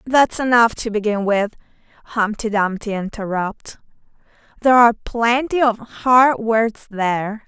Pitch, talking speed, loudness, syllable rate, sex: 220 Hz, 120 wpm, -18 LUFS, 4.5 syllables/s, female